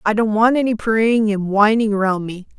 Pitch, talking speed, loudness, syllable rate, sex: 215 Hz, 210 wpm, -17 LUFS, 4.6 syllables/s, female